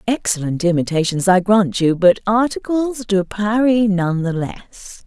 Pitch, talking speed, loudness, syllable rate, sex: 200 Hz, 140 wpm, -17 LUFS, 4.5 syllables/s, female